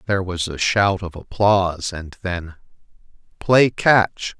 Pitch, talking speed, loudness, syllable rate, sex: 95 Hz, 125 wpm, -19 LUFS, 3.8 syllables/s, male